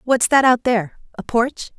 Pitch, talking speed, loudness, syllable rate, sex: 240 Hz, 200 wpm, -17 LUFS, 4.8 syllables/s, female